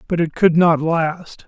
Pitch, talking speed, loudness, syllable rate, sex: 165 Hz, 205 wpm, -17 LUFS, 3.8 syllables/s, male